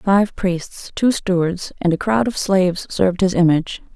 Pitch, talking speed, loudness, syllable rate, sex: 185 Hz, 180 wpm, -18 LUFS, 4.6 syllables/s, female